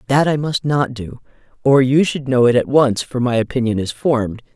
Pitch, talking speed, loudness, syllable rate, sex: 130 Hz, 225 wpm, -17 LUFS, 5.2 syllables/s, female